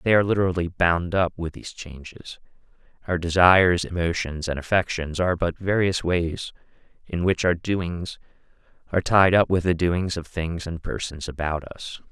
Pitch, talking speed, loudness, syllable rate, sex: 85 Hz, 165 wpm, -23 LUFS, 5.0 syllables/s, male